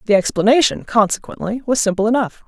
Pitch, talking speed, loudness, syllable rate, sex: 225 Hz, 145 wpm, -17 LUFS, 6.1 syllables/s, female